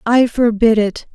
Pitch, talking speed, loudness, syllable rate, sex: 225 Hz, 155 wpm, -14 LUFS, 4.0 syllables/s, female